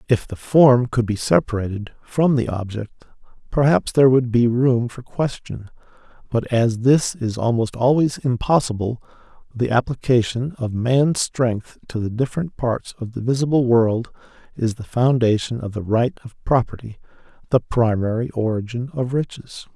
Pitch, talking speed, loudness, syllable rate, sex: 120 Hz, 150 wpm, -20 LUFS, 4.6 syllables/s, male